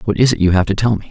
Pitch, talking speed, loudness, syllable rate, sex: 105 Hz, 435 wpm, -15 LUFS, 7.9 syllables/s, male